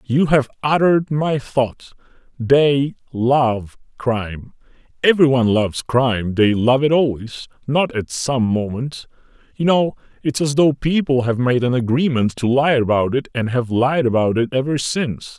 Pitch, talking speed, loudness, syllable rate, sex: 130 Hz, 160 wpm, -18 LUFS, 4.5 syllables/s, male